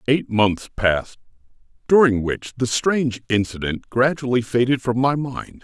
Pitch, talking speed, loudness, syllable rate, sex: 125 Hz, 140 wpm, -20 LUFS, 4.5 syllables/s, male